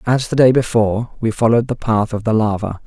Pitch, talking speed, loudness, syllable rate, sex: 115 Hz, 230 wpm, -16 LUFS, 6.0 syllables/s, male